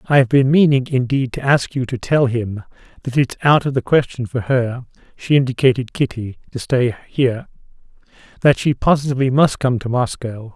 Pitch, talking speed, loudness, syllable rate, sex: 130 Hz, 175 wpm, -17 LUFS, 4.9 syllables/s, male